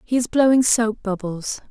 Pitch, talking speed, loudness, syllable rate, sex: 225 Hz, 175 wpm, -19 LUFS, 4.6 syllables/s, female